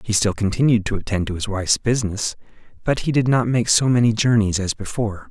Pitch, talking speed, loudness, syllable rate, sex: 110 Hz, 215 wpm, -20 LUFS, 6.1 syllables/s, male